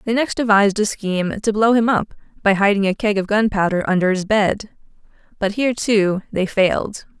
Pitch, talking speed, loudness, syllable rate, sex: 205 Hz, 190 wpm, -18 LUFS, 5.4 syllables/s, female